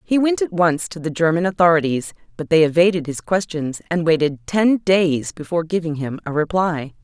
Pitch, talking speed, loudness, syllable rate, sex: 170 Hz, 190 wpm, -19 LUFS, 5.2 syllables/s, female